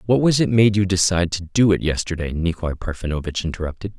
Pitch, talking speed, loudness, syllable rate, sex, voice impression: 90 Hz, 195 wpm, -20 LUFS, 6.5 syllables/s, male, very masculine, very adult-like, very thick, slightly relaxed, very powerful, slightly bright, very soft, slightly muffled, fluent, slightly raspy, very cool, very intellectual, slightly refreshing, very sincere, very calm, mature, friendly, very reassuring, very unique, elegant, wild, very sweet, lively, kind, slightly modest